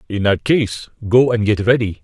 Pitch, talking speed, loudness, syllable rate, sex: 110 Hz, 205 wpm, -16 LUFS, 4.8 syllables/s, male